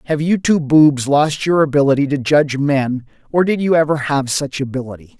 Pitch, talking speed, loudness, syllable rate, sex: 145 Hz, 195 wpm, -16 LUFS, 5.2 syllables/s, male